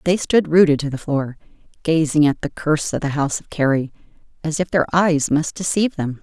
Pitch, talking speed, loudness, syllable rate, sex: 155 Hz, 210 wpm, -19 LUFS, 5.7 syllables/s, female